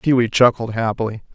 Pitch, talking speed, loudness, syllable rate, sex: 115 Hz, 135 wpm, -18 LUFS, 5.7 syllables/s, male